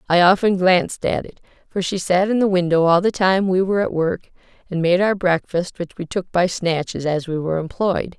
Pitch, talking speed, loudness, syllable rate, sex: 180 Hz, 225 wpm, -19 LUFS, 5.4 syllables/s, female